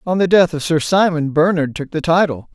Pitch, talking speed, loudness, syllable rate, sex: 165 Hz, 235 wpm, -16 LUFS, 5.4 syllables/s, male